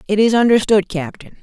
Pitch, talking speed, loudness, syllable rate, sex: 205 Hz, 170 wpm, -15 LUFS, 5.7 syllables/s, female